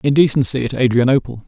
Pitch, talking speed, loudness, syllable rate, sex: 130 Hz, 120 wpm, -16 LUFS, 6.3 syllables/s, male